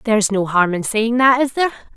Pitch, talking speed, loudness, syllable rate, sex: 225 Hz, 245 wpm, -16 LUFS, 6.2 syllables/s, female